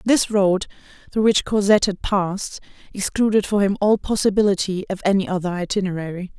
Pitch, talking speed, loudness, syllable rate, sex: 195 Hz, 150 wpm, -20 LUFS, 5.8 syllables/s, female